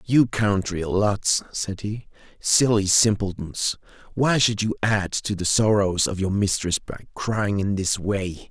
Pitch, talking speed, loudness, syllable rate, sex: 100 Hz, 155 wpm, -22 LUFS, 3.7 syllables/s, male